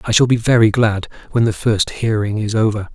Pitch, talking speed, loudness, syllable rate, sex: 110 Hz, 225 wpm, -16 LUFS, 5.4 syllables/s, male